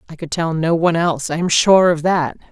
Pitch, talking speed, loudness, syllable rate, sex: 165 Hz, 265 wpm, -16 LUFS, 5.9 syllables/s, female